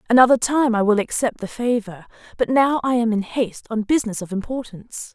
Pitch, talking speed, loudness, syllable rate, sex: 230 Hz, 200 wpm, -20 LUFS, 5.9 syllables/s, female